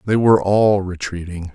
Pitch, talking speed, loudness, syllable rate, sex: 95 Hz, 155 wpm, -17 LUFS, 5.1 syllables/s, male